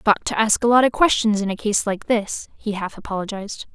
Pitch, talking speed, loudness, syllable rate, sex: 215 Hz, 240 wpm, -20 LUFS, 5.6 syllables/s, female